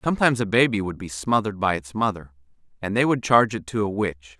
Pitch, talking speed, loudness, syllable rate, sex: 105 Hz, 230 wpm, -22 LUFS, 6.5 syllables/s, male